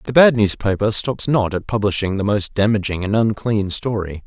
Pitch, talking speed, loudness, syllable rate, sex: 105 Hz, 185 wpm, -18 LUFS, 5.1 syllables/s, male